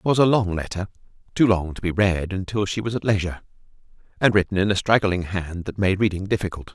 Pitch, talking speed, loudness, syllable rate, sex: 95 Hz, 225 wpm, -22 LUFS, 6.2 syllables/s, male